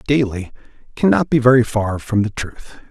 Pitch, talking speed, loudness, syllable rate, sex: 120 Hz, 165 wpm, -17 LUFS, 5.0 syllables/s, male